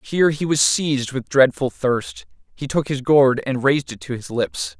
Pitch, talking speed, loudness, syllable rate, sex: 135 Hz, 215 wpm, -19 LUFS, 4.7 syllables/s, male